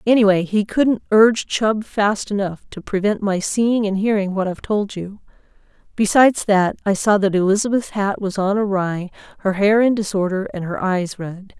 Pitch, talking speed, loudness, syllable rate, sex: 200 Hz, 180 wpm, -18 LUFS, 4.9 syllables/s, female